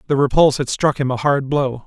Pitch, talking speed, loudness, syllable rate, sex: 140 Hz, 255 wpm, -17 LUFS, 5.9 syllables/s, male